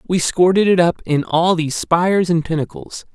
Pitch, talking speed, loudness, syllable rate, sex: 170 Hz, 190 wpm, -16 LUFS, 5.1 syllables/s, male